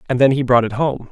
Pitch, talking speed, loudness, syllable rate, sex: 125 Hz, 325 wpm, -16 LUFS, 6.5 syllables/s, male